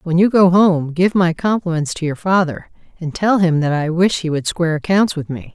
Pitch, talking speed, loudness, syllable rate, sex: 170 Hz, 240 wpm, -16 LUFS, 5.2 syllables/s, female